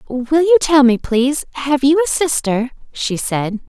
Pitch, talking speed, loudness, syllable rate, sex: 275 Hz, 175 wpm, -15 LUFS, 4.3 syllables/s, female